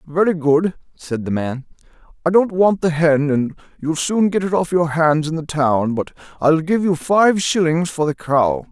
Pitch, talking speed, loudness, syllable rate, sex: 160 Hz, 205 wpm, -18 LUFS, 4.4 syllables/s, male